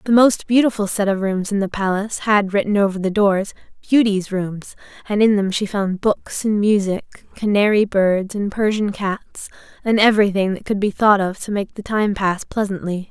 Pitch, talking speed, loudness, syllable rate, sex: 200 Hz, 190 wpm, -18 LUFS, 4.9 syllables/s, female